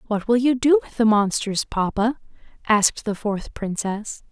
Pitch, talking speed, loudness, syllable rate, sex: 220 Hz, 165 wpm, -21 LUFS, 4.4 syllables/s, female